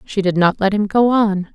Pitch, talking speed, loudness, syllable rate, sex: 200 Hz, 270 wpm, -16 LUFS, 4.8 syllables/s, female